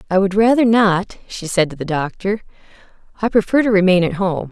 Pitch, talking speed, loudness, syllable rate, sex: 195 Hz, 200 wpm, -16 LUFS, 5.6 syllables/s, female